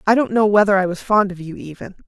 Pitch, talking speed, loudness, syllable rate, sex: 195 Hz, 290 wpm, -16 LUFS, 6.5 syllables/s, female